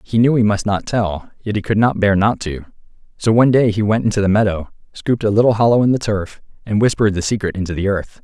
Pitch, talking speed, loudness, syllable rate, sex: 105 Hz, 255 wpm, -17 LUFS, 6.4 syllables/s, male